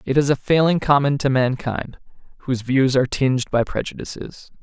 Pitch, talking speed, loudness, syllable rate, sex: 135 Hz, 170 wpm, -20 LUFS, 5.6 syllables/s, male